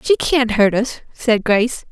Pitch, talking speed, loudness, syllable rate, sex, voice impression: 235 Hz, 190 wpm, -17 LUFS, 4.2 syllables/s, female, very feminine, slightly young, slightly adult-like, very thin, tensed, slightly powerful, very bright, hard, clear, fluent, slightly raspy, cute, intellectual, very refreshing, sincere, slightly calm, friendly, reassuring, very unique, elegant, slightly wild, sweet, lively, kind, slightly sharp